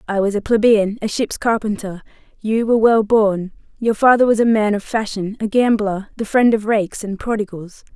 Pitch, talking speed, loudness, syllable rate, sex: 215 Hz, 195 wpm, -17 LUFS, 5.2 syllables/s, female